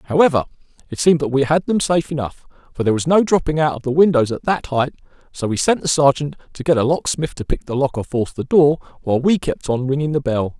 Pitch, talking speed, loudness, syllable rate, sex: 145 Hz, 255 wpm, -18 LUFS, 6.4 syllables/s, male